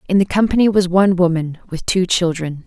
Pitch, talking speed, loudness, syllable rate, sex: 180 Hz, 205 wpm, -16 LUFS, 5.9 syllables/s, female